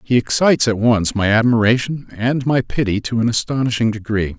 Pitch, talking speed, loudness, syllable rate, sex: 115 Hz, 180 wpm, -17 LUFS, 5.5 syllables/s, male